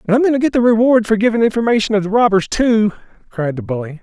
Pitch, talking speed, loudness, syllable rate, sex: 215 Hz, 255 wpm, -15 LUFS, 6.7 syllables/s, male